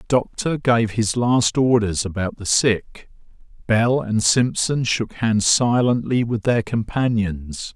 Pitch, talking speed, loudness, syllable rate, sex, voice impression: 115 Hz, 140 wpm, -19 LUFS, 3.6 syllables/s, male, very masculine, very adult-like, very middle-aged, very thick, very tensed, very powerful, slightly bright, soft, slightly muffled, fluent, very cool, very intellectual, very sincere, very calm, very mature, very friendly, very reassuring, unique, elegant, wild, very sweet, slightly lively, slightly kind, modest